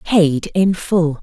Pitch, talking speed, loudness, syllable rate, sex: 170 Hz, 145 wpm, -16 LUFS, 2.8 syllables/s, female